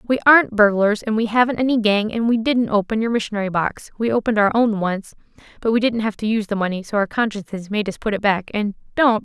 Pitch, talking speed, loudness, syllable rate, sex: 215 Hz, 240 wpm, -19 LUFS, 6.2 syllables/s, female